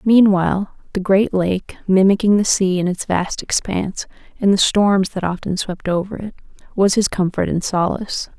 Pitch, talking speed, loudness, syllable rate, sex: 190 Hz, 170 wpm, -18 LUFS, 4.9 syllables/s, female